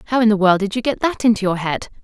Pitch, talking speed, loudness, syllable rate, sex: 215 Hz, 325 wpm, -17 LUFS, 7.1 syllables/s, female